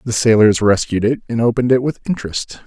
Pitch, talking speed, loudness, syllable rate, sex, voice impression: 115 Hz, 205 wpm, -16 LUFS, 6.4 syllables/s, male, very masculine, very adult-like, calm, mature, reassuring, slightly wild, slightly sweet